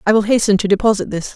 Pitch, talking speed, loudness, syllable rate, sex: 205 Hz, 265 wpm, -15 LUFS, 7.3 syllables/s, female